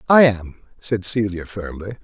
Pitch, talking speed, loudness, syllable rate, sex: 105 Hz, 150 wpm, -20 LUFS, 4.5 syllables/s, male